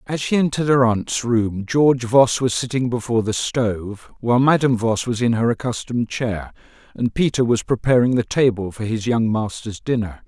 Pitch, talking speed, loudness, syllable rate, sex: 120 Hz, 185 wpm, -19 LUFS, 5.3 syllables/s, male